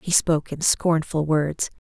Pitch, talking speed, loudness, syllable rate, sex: 160 Hz, 160 wpm, -22 LUFS, 4.3 syllables/s, female